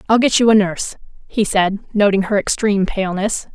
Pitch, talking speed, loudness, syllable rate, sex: 200 Hz, 185 wpm, -17 LUFS, 5.8 syllables/s, female